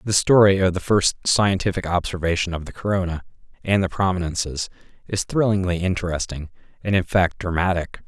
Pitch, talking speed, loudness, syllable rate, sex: 90 Hz, 150 wpm, -21 LUFS, 5.7 syllables/s, male